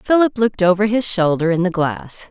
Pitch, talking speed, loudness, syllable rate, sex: 190 Hz, 210 wpm, -17 LUFS, 5.4 syllables/s, female